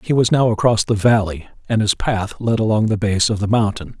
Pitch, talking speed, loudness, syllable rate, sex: 105 Hz, 240 wpm, -17 LUFS, 5.4 syllables/s, male